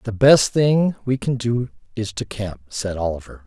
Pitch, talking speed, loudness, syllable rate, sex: 115 Hz, 190 wpm, -20 LUFS, 4.4 syllables/s, male